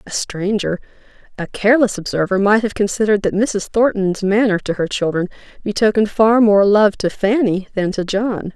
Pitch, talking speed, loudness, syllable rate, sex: 205 Hz, 170 wpm, -16 LUFS, 5.3 syllables/s, female